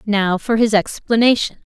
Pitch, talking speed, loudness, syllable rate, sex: 215 Hz, 140 wpm, -16 LUFS, 4.5 syllables/s, female